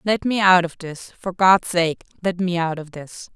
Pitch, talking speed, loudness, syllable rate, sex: 180 Hz, 215 wpm, -19 LUFS, 4.5 syllables/s, female